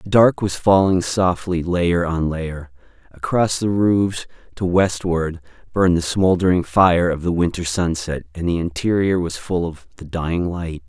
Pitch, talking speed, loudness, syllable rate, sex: 90 Hz, 165 wpm, -19 LUFS, 4.4 syllables/s, male